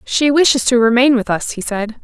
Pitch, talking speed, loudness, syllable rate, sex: 245 Hz, 235 wpm, -14 LUFS, 5.3 syllables/s, female